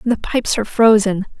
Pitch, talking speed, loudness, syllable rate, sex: 215 Hz, 170 wpm, -16 LUFS, 5.9 syllables/s, female